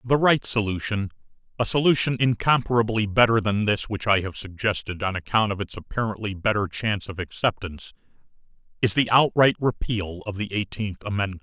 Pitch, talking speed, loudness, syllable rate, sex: 105 Hz, 145 wpm, -23 LUFS, 5.7 syllables/s, male